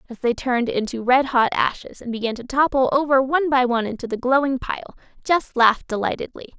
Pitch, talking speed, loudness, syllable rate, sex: 250 Hz, 200 wpm, -20 LUFS, 6.0 syllables/s, female